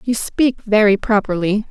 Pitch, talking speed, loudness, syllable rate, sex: 210 Hz, 140 wpm, -16 LUFS, 4.4 syllables/s, female